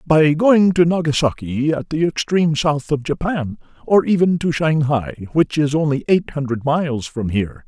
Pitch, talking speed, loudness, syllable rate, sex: 150 Hz, 170 wpm, -18 LUFS, 4.9 syllables/s, male